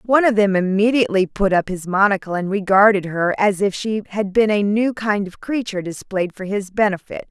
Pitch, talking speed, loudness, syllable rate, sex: 200 Hz, 205 wpm, -18 LUFS, 5.5 syllables/s, female